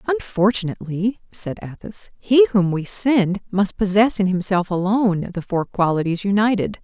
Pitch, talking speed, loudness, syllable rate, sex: 200 Hz, 140 wpm, -19 LUFS, 4.7 syllables/s, female